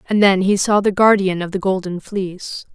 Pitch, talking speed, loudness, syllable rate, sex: 190 Hz, 220 wpm, -17 LUFS, 5.0 syllables/s, female